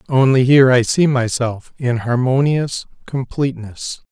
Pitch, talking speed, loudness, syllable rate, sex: 130 Hz, 115 wpm, -16 LUFS, 4.4 syllables/s, male